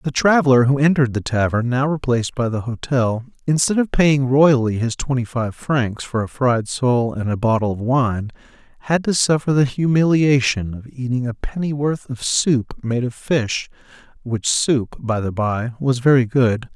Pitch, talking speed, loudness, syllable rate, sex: 130 Hz, 175 wpm, -19 LUFS, 4.6 syllables/s, male